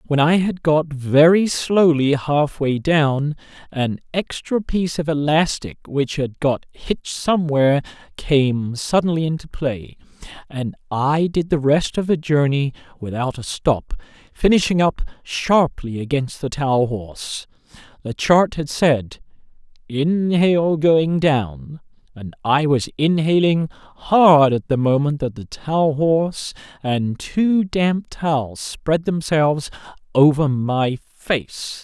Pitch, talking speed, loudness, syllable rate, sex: 150 Hz, 130 wpm, -19 LUFS, 3.8 syllables/s, male